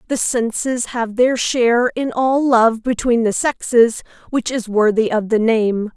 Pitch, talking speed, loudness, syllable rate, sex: 235 Hz, 170 wpm, -17 LUFS, 4.1 syllables/s, female